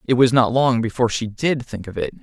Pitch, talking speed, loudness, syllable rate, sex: 120 Hz, 270 wpm, -19 LUFS, 5.9 syllables/s, male